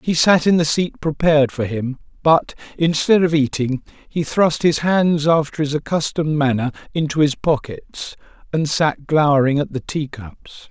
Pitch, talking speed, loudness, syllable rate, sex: 150 Hz, 165 wpm, -18 LUFS, 4.6 syllables/s, male